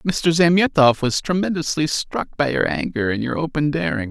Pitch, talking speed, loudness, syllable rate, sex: 145 Hz, 175 wpm, -19 LUFS, 4.9 syllables/s, male